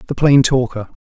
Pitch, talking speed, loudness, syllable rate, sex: 130 Hz, 175 wpm, -14 LUFS, 5.3 syllables/s, male